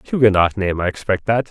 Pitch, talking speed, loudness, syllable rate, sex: 100 Hz, 200 wpm, -18 LUFS, 5.8 syllables/s, male